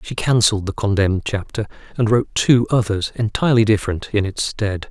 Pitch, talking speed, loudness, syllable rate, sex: 105 Hz, 170 wpm, -18 LUFS, 6.0 syllables/s, male